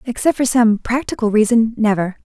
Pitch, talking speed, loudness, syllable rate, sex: 230 Hz, 130 wpm, -16 LUFS, 5.3 syllables/s, female